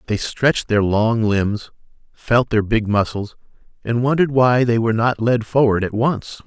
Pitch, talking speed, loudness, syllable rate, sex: 115 Hz, 175 wpm, -18 LUFS, 4.7 syllables/s, male